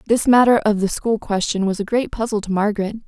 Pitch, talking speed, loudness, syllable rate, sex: 215 Hz, 235 wpm, -18 LUFS, 6.1 syllables/s, female